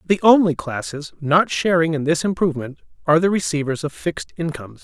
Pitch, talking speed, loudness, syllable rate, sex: 155 Hz, 175 wpm, -20 LUFS, 6.2 syllables/s, male